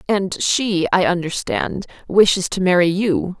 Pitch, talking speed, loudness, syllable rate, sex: 185 Hz, 140 wpm, -18 LUFS, 4.1 syllables/s, female